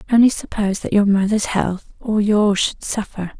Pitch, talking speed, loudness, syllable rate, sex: 210 Hz, 175 wpm, -18 LUFS, 4.9 syllables/s, female